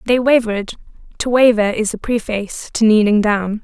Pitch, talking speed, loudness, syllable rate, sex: 220 Hz, 150 wpm, -16 LUFS, 5.4 syllables/s, female